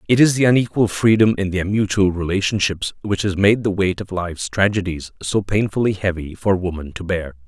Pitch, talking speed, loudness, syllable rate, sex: 95 Hz, 195 wpm, -19 LUFS, 5.4 syllables/s, male